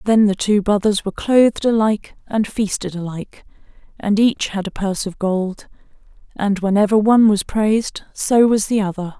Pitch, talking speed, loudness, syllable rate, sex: 205 Hz, 170 wpm, -18 LUFS, 5.2 syllables/s, female